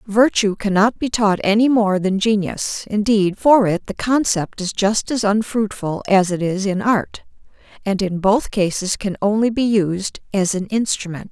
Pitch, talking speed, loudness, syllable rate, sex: 205 Hz, 175 wpm, -18 LUFS, 4.3 syllables/s, female